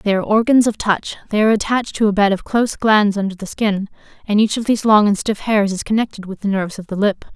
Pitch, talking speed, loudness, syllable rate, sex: 205 Hz, 270 wpm, -17 LUFS, 6.6 syllables/s, female